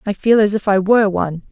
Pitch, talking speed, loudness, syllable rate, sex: 205 Hz, 280 wpm, -15 LUFS, 6.8 syllables/s, female